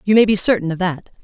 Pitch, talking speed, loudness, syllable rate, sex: 190 Hz, 290 wpm, -17 LUFS, 6.7 syllables/s, female